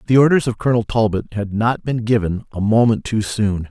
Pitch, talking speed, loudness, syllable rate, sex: 110 Hz, 210 wpm, -18 LUFS, 5.6 syllables/s, male